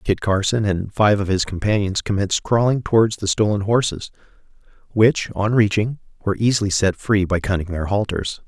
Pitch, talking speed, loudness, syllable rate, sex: 100 Hz, 170 wpm, -19 LUFS, 5.4 syllables/s, male